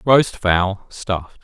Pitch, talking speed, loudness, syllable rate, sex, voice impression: 100 Hz, 125 wpm, -19 LUFS, 3.2 syllables/s, male, masculine, adult-like, intellectual, calm, slightly mature, slightly sweet